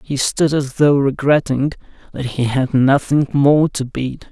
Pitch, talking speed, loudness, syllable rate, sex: 140 Hz, 165 wpm, -16 LUFS, 4.1 syllables/s, male